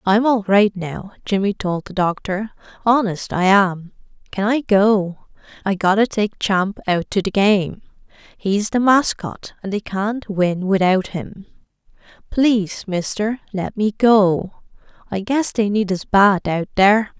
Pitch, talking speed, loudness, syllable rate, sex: 200 Hz, 135 wpm, -18 LUFS, 3.9 syllables/s, female